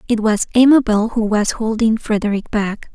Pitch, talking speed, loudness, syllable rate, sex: 220 Hz, 165 wpm, -16 LUFS, 4.7 syllables/s, female